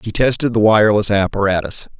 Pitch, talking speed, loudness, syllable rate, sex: 105 Hz, 150 wpm, -15 LUFS, 6.0 syllables/s, male